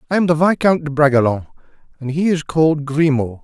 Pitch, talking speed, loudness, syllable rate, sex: 150 Hz, 190 wpm, -16 LUFS, 6.3 syllables/s, male